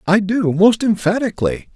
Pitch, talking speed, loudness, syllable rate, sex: 200 Hz, 135 wpm, -16 LUFS, 5.0 syllables/s, male